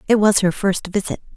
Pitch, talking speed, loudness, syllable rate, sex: 200 Hz, 220 wpm, -18 LUFS, 5.5 syllables/s, female